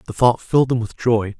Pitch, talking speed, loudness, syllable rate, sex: 120 Hz, 260 wpm, -18 LUFS, 5.7 syllables/s, male